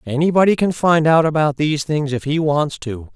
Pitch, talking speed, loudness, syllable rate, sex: 150 Hz, 210 wpm, -17 LUFS, 5.4 syllables/s, male